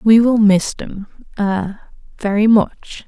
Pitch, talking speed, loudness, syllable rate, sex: 210 Hz, 100 wpm, -15 LUFS, 3.4 syllables/s, female